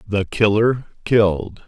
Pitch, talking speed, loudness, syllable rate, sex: 105 Hz, 105 wpm, -18 LUFS, 3.9 syllables/s, male